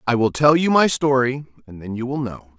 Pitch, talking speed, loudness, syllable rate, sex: 125 Hz, 255 wpm, -18 LUFS, 5.3 syllables/s, male